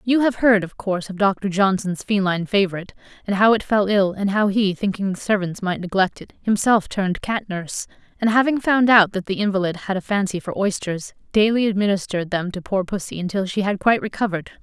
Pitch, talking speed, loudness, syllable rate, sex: 200 Hz, 210 wpm, -20 LUFS, 5.9 syllables/s, female